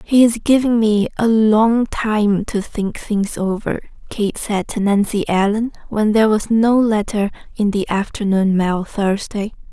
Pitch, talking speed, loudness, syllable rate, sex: 210 Hz, 160 wpm, -17 LUFS, 4.1 syllables/s, female